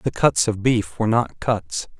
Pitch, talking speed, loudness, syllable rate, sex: 110 Hz, 210 wpm, -21 LUFS, 4.3 syllables/s, male